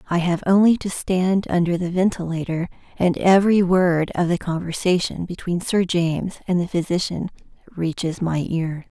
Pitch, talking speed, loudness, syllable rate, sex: 175 Hz, 155 wpm, -21 LUFS, 4.9 syllables/s, female